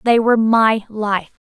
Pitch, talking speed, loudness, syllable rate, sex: 215 Hz, 160 wpm, -16 LUFS, 4.3 syllables/s, female